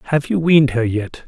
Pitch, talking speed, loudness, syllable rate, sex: 140 Hz, 235 wpm, -16 LUFS, 5.8 syllables/s, male